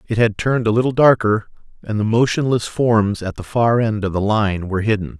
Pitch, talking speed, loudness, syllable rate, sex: 110 Hz, 220 wpm, -18 LUFS, 5.6 syllables/s, male